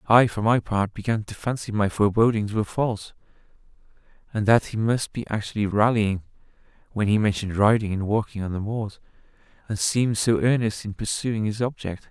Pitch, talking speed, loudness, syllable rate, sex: 105 Hz, 175 wpm, -24 LUFS, 5.6 syllables/s, male